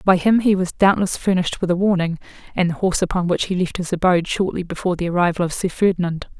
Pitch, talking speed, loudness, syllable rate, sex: 180 Hz, 235 wpm, -19 LUFS, 6.8 syllables/s, female